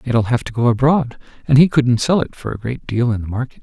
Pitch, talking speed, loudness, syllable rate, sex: 125 Hz, 280 wpm, -17 LUFS, 5.9 syllables/s, male